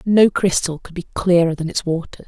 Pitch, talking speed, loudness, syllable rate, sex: 175 Hz, 210 wpm, -18 LUFS, 5.2 syllables/s, female